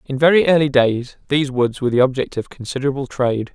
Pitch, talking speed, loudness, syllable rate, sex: 135 Hz, 205 wpm, -18 LUFS, 6.6 syllables/s, male